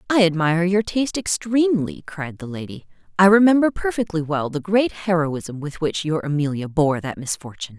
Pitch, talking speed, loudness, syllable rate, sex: 170 Hz, 170 wpm, -20 LUFS, 5.4 syllables/s, female